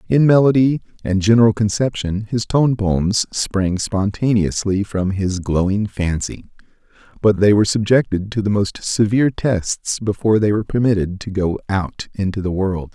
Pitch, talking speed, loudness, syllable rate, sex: 105 Hz, 155 wpm, -18 LUFS, 4.8 syllables/s, male